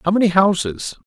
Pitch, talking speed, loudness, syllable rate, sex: 180 Hz, 170 wpm, -17 LUFS, 5.6 syllables/s, male